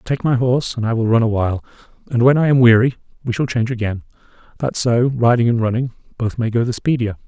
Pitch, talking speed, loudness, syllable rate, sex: 120 Hz, 225 wpm, -17 LUFS, 6.5 syllables/s, male